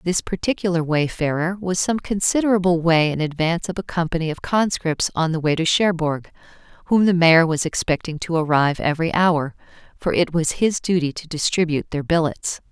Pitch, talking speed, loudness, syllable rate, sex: 170 Hz, 175 wpm, -20 LUFS, 5.5 syllables/s, female